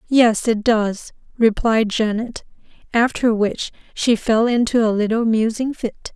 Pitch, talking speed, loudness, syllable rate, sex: 225 Hz, 135 wpm, -18 LUFS, 4.0 syllables/s, female